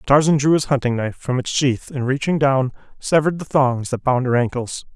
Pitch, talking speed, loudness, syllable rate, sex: 135 Hz, 220 wpm, -19 LUFS, 5.6 syllables/s, male